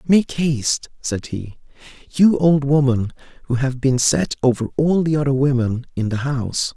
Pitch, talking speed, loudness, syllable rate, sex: 135 Hz, 170 wpm, -19 LUFS, 4.6 syllables/s, male